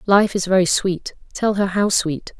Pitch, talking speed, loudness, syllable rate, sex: 190 Hz, 175 wpm, -19 LUFS, 4.4 syllables/s, female